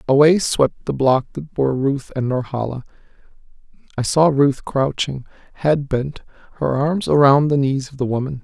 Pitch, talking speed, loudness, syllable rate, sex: 135 Hz, 165 wpm, -18 LUFS, 4.6 syllables/s, male